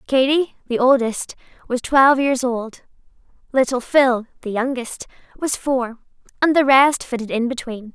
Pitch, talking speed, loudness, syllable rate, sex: 255 Hz, 145 wpm, -19 LUFS, 4.5 syllables/s, female